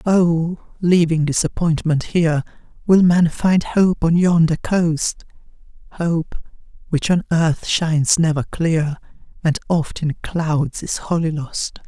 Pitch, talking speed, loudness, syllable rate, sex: 165 Hz, 125 wpm, -18 LUFS, 3.7 syllables/s, female